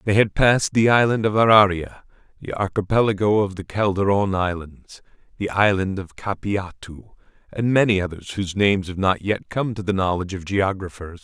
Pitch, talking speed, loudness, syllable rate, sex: 100 Hz, 165 wpm, -20 LUFS, 5.4 syllables/s, male